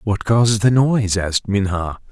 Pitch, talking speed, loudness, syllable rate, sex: 105 Hz, 170 wpm, -17 LUFS, 5.2 syllables/s, male